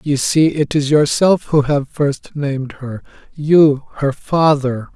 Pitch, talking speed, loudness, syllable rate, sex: 145 Hz, 145 wpm, -15 LUFS, 3.7 syllables/s, male